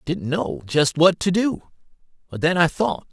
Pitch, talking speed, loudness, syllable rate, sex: 165 Hz, 210 wpm, -20 LUFS, 4.7 syllables/s, male